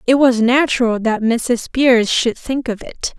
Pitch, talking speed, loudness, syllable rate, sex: 245 Hz, 190 wpm, -16 LUFS, 4.0 syllables/s, female